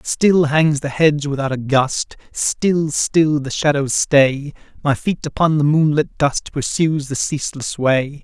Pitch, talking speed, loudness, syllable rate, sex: 145 Hz, 160 wpm, -17 LUFS, 3.9 syllables/s, male